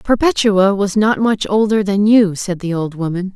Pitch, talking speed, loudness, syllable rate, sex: 200 Hz, 195 wpm, -15 LUFS, 4.7 syllables/s, female